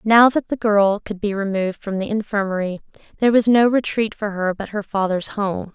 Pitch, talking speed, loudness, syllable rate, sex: 205 Hz, 210 wpm, -19 LUFS, 5.4 syllables/s, female